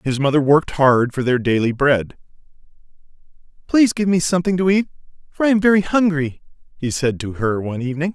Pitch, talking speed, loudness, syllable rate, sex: 155 Hz, 185 wpm, -18 LUFS, 6.3 syllables/s, male